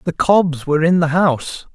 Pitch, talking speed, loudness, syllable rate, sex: 160 Hz, 205 wpm, -16 LUFS, 5.1 syllables/s, male